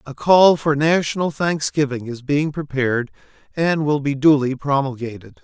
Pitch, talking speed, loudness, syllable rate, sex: 145 Hz, 145 wpm, -18 LUFS, 4.8 syllables/s, male